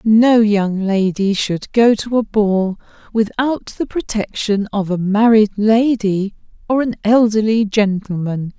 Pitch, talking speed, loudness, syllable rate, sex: 210 Hz, 135 wpm, -16 LUFS, 3.8 syllables/s, female